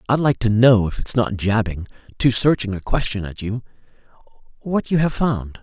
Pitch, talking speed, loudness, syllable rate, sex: 115 Hz, 180 wpm, -19 LUFS, 5.0 syllables/s, male